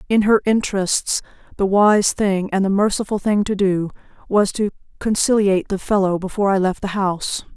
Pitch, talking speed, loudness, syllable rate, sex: 200 Hz, 175 wpm, -19 LUFS, 5.3 syllables/s, female